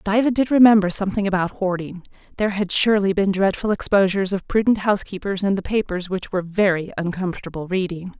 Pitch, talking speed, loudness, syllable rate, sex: 195 Hz, 170 wpm, -20 LUFS, 6.3 syllables/s, female